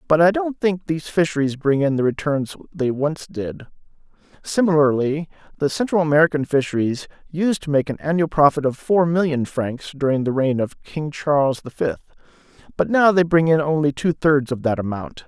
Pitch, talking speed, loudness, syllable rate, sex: 150 Hz, 185 wpm, -20 LUFS, 5.2 syllables/s, male